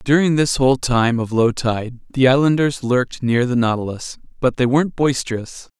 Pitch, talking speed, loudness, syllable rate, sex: 130 Hz, 175 wpm, -18 LUFS, 5.2 syllables/s, male